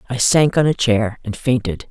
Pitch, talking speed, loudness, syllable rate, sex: 120 Hz, 220 wpm, -17 LUFS, 4.8 syllables/s, female